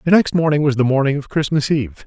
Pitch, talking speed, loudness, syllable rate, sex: 145 Hz, 260 wpm, -17 LUFS, 6.7 syllables/s, male